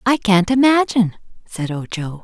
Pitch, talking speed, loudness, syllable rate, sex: 205 Hz, 135 wpm, -17 LUFS, 4.9 syllables/s, female